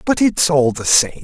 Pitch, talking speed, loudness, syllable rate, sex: 155 Hz, 245 wpm, -15 LUFS, 4.5 syllables/s, male